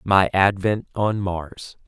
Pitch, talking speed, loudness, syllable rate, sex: 95 Hz, 130 wpm, -21 LUFS, 3.1 syllables/s, male